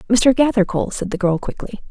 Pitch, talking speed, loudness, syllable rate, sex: 215 Hz, 190 wpm, -18 LUFS, 6.2 syllables/s, female